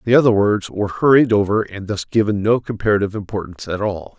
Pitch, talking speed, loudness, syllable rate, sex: 105 Hz, 200 wpm, -18 LUFS, 6.5 syllables/s, male